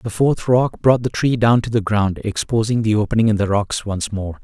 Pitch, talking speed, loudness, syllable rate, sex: 110 Hz, 245 wpm, -18 LUFS, 5.1 syllables/s, male